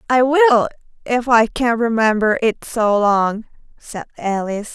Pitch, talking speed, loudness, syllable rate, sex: 230 Hz, 140 wpm, -16 LUFS, 4.0 syllables/s, female